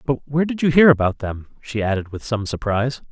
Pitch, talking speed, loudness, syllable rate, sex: 125 Hz, 230 wpm, -20 LUFS, 6.1 syllables/s, male